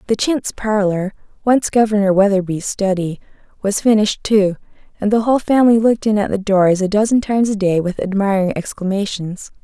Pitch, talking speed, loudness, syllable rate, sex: 205 Hz, 170 wpm, -16 LUFS, 5.6 syllables/s, female